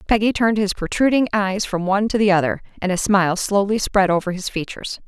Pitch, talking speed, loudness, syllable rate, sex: 200 Hz, 215 wpm, -19 LUFS, 6.3 syllables/s, female